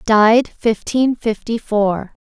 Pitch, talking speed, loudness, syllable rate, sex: 220 Hz, 105 wpm, -17 LUFS, 3.5 syllables/s, female